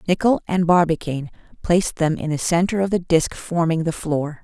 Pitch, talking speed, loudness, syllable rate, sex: 170 Hz, 190 wpm, -20 LUFS, 5.4 syllables/s, female